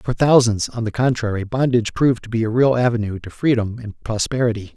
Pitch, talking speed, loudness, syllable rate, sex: 115 Hz, 200 wpm, -19 LUFS, 6.2 syllables/s, male